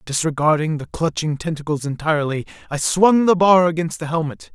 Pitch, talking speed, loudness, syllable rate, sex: 160 Hz, 160 wpm, -19 LUFS, 5.5 syllables/s, male